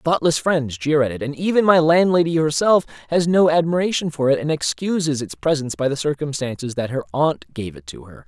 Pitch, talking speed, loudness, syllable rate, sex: 145 Hz, 210 wpm, -19 LUFS, 5.6 syllables/s, male